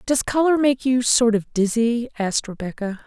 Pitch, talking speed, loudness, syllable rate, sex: 235 Hz, 175 wpm, -20 LUFS, 5.0 syllables/s, female